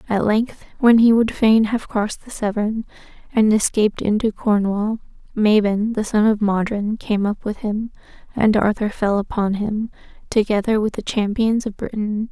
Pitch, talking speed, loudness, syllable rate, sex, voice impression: 215 Hz, 165 wpm, -19 LUFS, 4.7 syllables/s, female, very feminine, young, very thin, relaxed, very weak, slightly dark, very soft, muffled, fluent, raspy, cute, intellectual, slightly refreshing, very sincere, very calm, friendly, slightly reassuring, very unique, elegant, slightly wild, very sweet, slightly lively, kind, very modest, very light